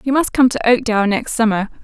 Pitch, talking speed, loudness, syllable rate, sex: 235 Hz, 230 wpm, -16 LUFS, 6.3 syllables/s, female